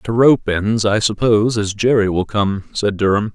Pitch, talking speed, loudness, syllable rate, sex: 105 Hz, 195 wpm, -16 LUFS, 4.6 syllables/s, male